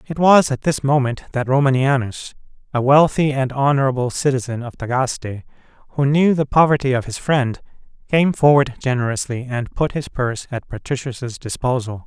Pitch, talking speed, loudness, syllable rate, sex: 130 Hz, 155 wpm, -18 LUFS, 5.3 syllables/s, male